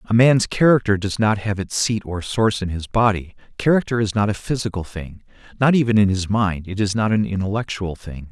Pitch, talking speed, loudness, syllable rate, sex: 105 Hz, 215 wpm, -20 LUFS, 5.5 syllables/s, male